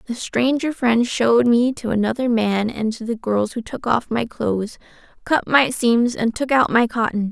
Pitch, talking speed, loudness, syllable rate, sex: 235 Hz, 205 wpm, -19 LUFS, 4.6 syllables/s, female